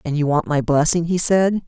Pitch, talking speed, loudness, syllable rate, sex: 160 Hz, 250 wpm, -18 LUFS, 5.2 syllables/s, female